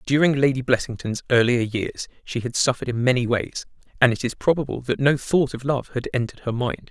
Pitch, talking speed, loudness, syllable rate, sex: 125 Hz, 210 wpm, -22 LUFS, 5.9 syllables/s, male